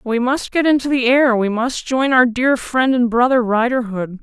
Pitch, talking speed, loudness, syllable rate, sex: 245 Hz, 215 wpm, -16 LUFS, 4.6 syllables/s, female